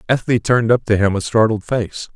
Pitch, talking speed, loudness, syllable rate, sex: 110 Hz, 220 wpm, -17 LUFS, 5.6 syllables/s, male